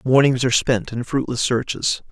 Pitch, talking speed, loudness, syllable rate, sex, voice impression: 125 Hz, 170 wpm, -20 LUFS, 5.1 syllables/s, male, adult-like, slightly cool, sincere, calm, kind